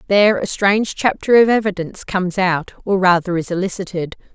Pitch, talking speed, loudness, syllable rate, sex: 190 Hz, 165 wpm, -17 LUFS, 5.9 syllables/s, female